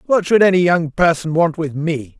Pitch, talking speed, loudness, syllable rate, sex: 165 Hz, 220 wpm, -16 LUFS, 4.9 syllables/s, male